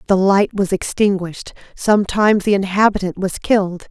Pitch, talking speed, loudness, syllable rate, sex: 195 Hz, 140 wpm, -16 LUFS, 5.4 syllables/s, female